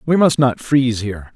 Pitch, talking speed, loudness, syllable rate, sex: 125 Hz, 220 wpm, -17 LUFS, 5.8 syllables/s, male